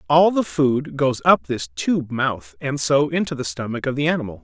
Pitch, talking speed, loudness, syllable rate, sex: 135 Hz, 215 wpm, -20 LUFS, 4.9 syllables/s, male